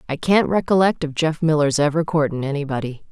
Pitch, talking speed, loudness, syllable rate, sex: 155 Hz, 175 wpm, -19 LUFS, 5.9 syllables/s, female